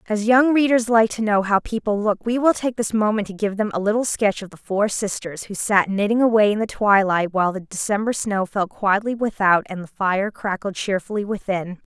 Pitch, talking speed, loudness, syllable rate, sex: 205 Hz, 220 wpm, -20 LUFS, 5.3 syllables/s, female